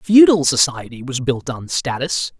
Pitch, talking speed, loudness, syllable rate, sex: 145 Hz, 150 wpm, -17 LUFS, 4.3 syllables/s, male